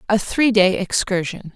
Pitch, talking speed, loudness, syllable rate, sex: 200 Hz, 155 wpm, -18 LUFS, 4.4 syllables/s, female